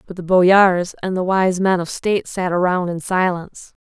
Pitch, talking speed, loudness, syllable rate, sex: 180 Hz, 205 wpm, -17 LUFS, 4.6 syllables/s, female